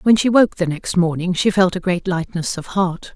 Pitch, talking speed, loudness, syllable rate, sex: 180 Hz, 245 wpm, -18 LUFS, 4.9 syllables/s, female